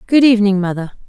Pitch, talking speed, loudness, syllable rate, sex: 210 Hz, 165 wpm, -14 LUFS, 7.1 syllables/s, female